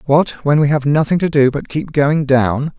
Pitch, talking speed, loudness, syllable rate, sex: 145 Hz, 235 wpm, -15 LUFS, 4.6 syllables/s, male